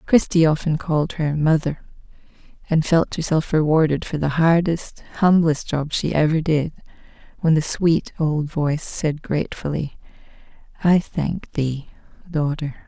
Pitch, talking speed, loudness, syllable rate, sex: 155 Hz, 130 wpm, -20 LUFS, 4.4 syllables/s, female